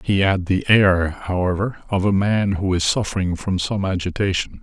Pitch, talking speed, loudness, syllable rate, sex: 95 Hz, 180 wpm, -20 LUFS, 4.8 syllables/s, male